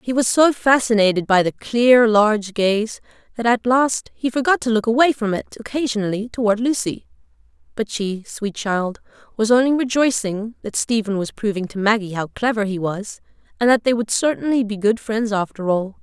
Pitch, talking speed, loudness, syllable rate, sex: 225 Hz, 185 wpm, -19 LUFS, 5.1 syllables/s, female